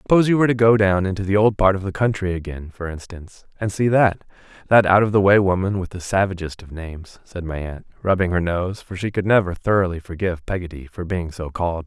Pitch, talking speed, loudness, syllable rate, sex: 95 Hz, 235 wpm, -20 LUFS, 6.3 syllables/s, male